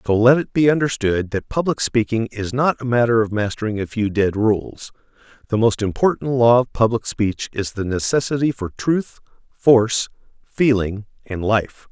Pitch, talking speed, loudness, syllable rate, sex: 115 Hz, 170 wpm, -19 LUFS, 4.8 syllables/s, male